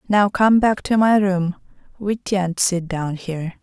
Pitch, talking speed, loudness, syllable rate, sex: 190 Hz, 180 wpm, -19 LUFS, 4.0 syllables/s, female